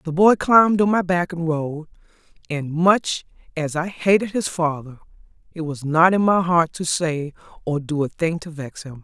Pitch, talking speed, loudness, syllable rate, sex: 165 Hz, 200 wpm, -20 LUFS, 4.6 syllables/s, female